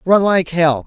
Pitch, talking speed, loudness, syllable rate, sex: 170 Hz, 210 wpm, -15 LUFS, 3.9 syllables/s, male